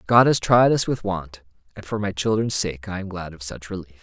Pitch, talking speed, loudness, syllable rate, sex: 100 Hz, 255 wpm, -22 LUFS, 5.5 syllables/s, male